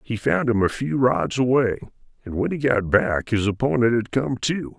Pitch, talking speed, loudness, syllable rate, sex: 120 Hz, 215 wpm, -21 LUFS, 4.8 syllables/s, male